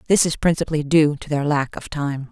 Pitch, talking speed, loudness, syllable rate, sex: 150 Hz, 235 wpm, -20 LUFS, 5.7 syllables/s, female